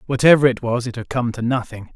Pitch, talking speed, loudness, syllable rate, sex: 120 Hz, 245 wpm, -18 LUFS, 6.2 syllables/s, male